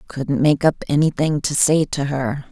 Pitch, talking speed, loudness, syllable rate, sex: 145 Hz, 190 wpm, -18 LUFS, 4.5 syllables/s, female